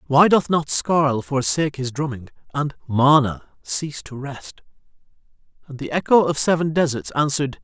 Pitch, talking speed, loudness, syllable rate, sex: 140 Hz, 165 wpm, -20 LUFS, 5.3 syllables/s, male